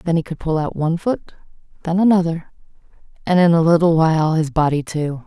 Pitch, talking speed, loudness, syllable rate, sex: 165 Hz, 195 wpm, -17 LUFS, 6.0 syllables/s, female